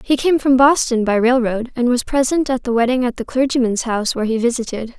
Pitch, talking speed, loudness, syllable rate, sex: 245 Hz, 230 wpm, -17 LUFS, 6.0 syllables/s, female